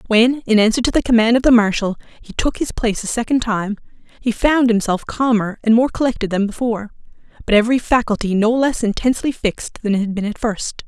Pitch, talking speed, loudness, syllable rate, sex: 225 Hz, 210 wpm, -17 LUFS, 6.2 syllables/s, female